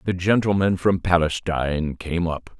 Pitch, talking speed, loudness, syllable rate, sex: 85 Hz, 140 wpm, -22 LUFS, 4.5 syllables/s, male